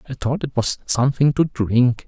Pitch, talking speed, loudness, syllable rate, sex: 130 Hz, 200 wpm, -19 LUFS, 5.0 syllables/s, male